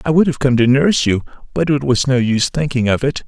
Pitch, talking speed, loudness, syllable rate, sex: 130 Hz, 275 wpm, -15 LUFS, 6.3 syllables/s, male